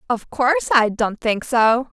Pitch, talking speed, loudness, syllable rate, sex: 240 Hz, 180 wpm, -18 LUFS, 4.0 syllables/s, female